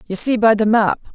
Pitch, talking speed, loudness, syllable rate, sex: 220 Hz, 265 wpm, -16 LUFS, 5.5 syllables/s, female